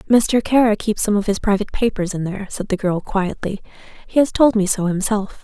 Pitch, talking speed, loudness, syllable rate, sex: 205 Hz, 220 wpm, -19 LUFS, 5.7 syllables/s, female